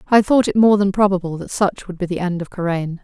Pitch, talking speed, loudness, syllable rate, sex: 190 Hz, 275 wpm, -18 LUFS, 5.9 syllables/s, female